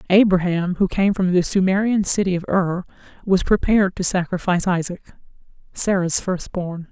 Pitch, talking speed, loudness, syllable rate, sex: 185 Hz, 150 wpm, -19 LUFS, 5.1 syllables/s, female